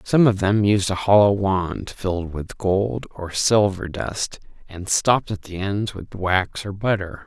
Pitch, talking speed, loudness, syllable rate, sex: 100 Hz, 180 wpm, -21 LUFS, 4.0 syllables/s, male